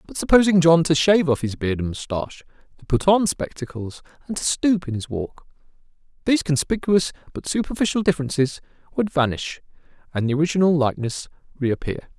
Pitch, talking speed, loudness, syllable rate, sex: 155 Hz, 160 wpm, -21 LUFS, 5.9 syllables/s, male